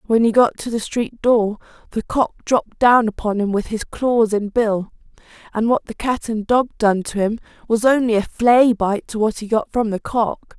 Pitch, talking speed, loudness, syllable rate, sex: 225 Hz, 220 wpm, -19 LUFS, 4.6 syllables/s, female